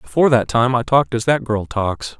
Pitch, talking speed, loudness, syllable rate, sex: 120 Hz, 245 wpm, -17 LUFS, 5.6 syllables/s, male